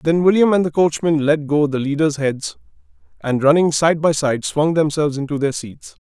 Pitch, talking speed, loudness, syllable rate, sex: 150 Hz, 200 wpm, -17 LUFS, 5.1 syllables/s, male